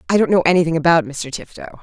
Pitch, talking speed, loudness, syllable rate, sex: 165 Hz, 230 wpm, -16 LUFS, 7.5 syllables/s, female